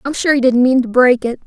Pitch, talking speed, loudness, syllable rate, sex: 255 Hz, 330 wpm, -13 LUFS, 6.0 syllables/s, female